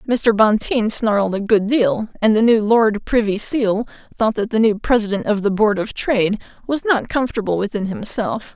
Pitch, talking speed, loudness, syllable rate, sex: 215 Hz, 190 wpm, -18 LUFS, 4.9 syllables/s, female